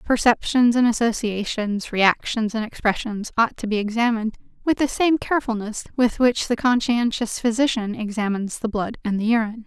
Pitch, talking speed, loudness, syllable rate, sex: 225 Hz, 155 wpm, -21 LUFS, 5.3 syllables/s, female